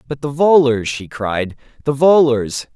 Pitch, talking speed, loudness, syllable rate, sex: 135 Hz, 150 wpm, -16 LUFS, 4.0 syllables/s, male